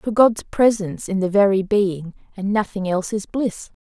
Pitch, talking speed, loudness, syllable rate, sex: 200 Hz, 190 wpm, -20 LUFS, 4.9 syllables/s, female